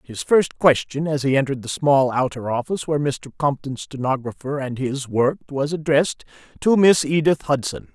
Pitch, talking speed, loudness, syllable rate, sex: 140 Hz, 175 wpm, -20 LUFS, 5.3 syllables/s, male